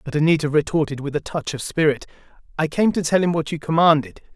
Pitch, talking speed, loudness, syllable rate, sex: 155 Hz, 220 wpm, -20 LUFS, 6.4 syllables/s, male